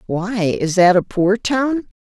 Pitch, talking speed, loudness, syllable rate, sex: 205 Hz, 175 wpm, -17 LUFS, 3.5 syllables/s, female